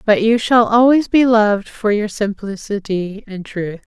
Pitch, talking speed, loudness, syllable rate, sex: 215 Hz, 165 wpm, -16 LUFS, 4.3 syllables/s, female